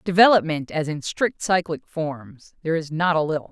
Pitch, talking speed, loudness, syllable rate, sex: 160 Hz, 190 wpm, -22 LUFS, 5.1 syllables/s, female